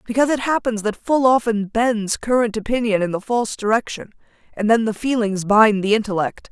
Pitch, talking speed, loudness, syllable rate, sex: 225 Hz, 185 wpm, -19 LUFS, 5.5 syllables/s, female